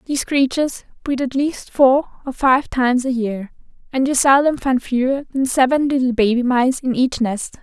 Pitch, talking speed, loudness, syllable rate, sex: 260 Hz, 190 wpm, -18 LUFS, 4.9 syllables/s, female